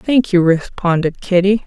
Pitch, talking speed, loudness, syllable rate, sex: 185 Hz, 145 wpm, -15 LUFS, 4.3 syllables/s, female